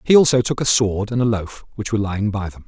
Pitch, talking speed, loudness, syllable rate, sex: 110 Hz, 290 wpm, -19 LUFS, 6.6 syllables/s, male